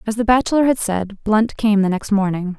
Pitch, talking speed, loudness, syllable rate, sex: 210 Hz, 230 wpm, -18 LUFS, 5.4 syllables/s, female